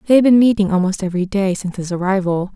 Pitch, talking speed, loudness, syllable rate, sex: 195 Hz, 235 wpm, -16 LUFS, 7.2 syllables/s, female